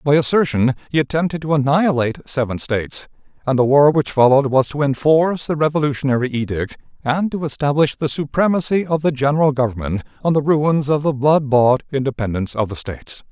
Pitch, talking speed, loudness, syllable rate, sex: 140 Hz, 175 wpm, -18 LUFS, 6.1 syllables/s, male